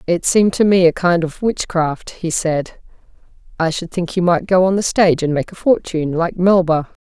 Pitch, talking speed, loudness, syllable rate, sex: 175 Hz, 215 wpm, -16 LUFS, 5.1 syllables/s, female